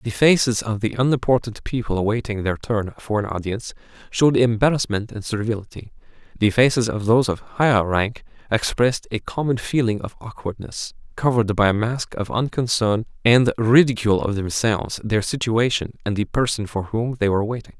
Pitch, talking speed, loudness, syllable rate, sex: 110 Hz, 165 wpm, -21 LUFS, 5.5 syllables/s, male